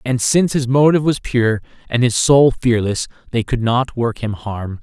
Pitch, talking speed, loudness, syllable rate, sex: 120 Hz, 200 wpm, -17 LUFS, 4.8 syllables/s, male